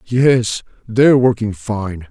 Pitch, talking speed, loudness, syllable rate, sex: 110 Hz, 115 wpm, -15 LUFS, 3.4 syllables/s, male